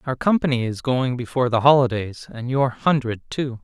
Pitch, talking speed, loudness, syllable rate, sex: 125 Hz, 180 wpm, -21 LUFS, 5.3 syllables/s, male